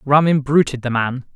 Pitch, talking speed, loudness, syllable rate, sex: 135 Hz, 180 wpm, -17 LUFS, 5.0 syllables/s, male